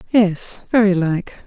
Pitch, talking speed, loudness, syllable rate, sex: 195 Hz, 125 wpm, -18 LUFS, 3.4 syllables/s, female